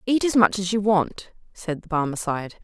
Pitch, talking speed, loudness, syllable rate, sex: 190 Hz, 205 wpm, -22 LUFS, 5.2 syllables/s, female